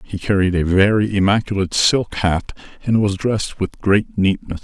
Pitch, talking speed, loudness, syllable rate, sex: 100 Hz, 170 wpm, -18 LUFS, 5.2 syllables/s, male